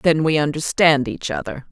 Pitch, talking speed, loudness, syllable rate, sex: 150 Hz, 175 wpm, -19 LUFS, 4.9 syllables/s, female